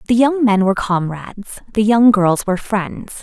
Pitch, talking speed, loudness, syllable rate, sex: 210 Hz, 185 wpm, -15 LUFS, 4.8 syllables/s, female